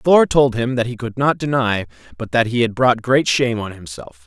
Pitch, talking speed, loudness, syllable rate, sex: 125 Hz, 240 wpm, -18 LUFS, 5.1 syllables/s, male